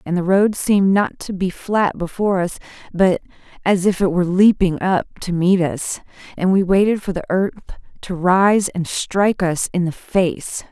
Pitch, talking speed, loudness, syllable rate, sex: 185 Hz, 190 wpm, -18 LUFS, 4.7 syllables/s, female